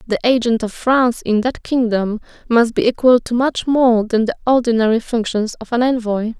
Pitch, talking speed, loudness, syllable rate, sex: 235 Hz, 190 wpm, -16 LUFS, 5.1 syllables/s, female